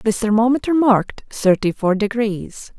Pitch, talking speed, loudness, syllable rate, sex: 220 Hz, 130 wpm, -17 LUFS, 4.6 syllables/s, female